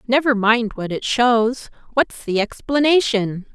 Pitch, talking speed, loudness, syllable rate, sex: 235 Hz, 135 wpm, -19 LUFS, 3.9 syllables/s, female